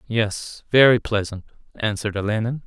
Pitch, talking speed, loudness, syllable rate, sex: 110 Hz, 115 wpm, -21 LUFS, 5.0 syllables/s, male